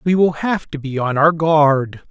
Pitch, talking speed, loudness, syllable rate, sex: 155 Hz, 230 wpm, -16 LUFS, 4.1 syllables/s, male